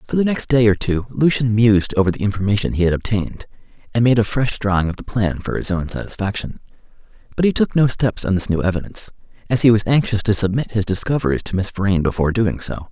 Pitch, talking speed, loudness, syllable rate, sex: 105 Hz, 230 wpm, -18 LUFS, 6.3 syllables/s, male